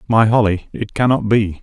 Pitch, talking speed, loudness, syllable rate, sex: 110 Hz, 185 wpm, -16 LUFS, 4.9 syllables/s, male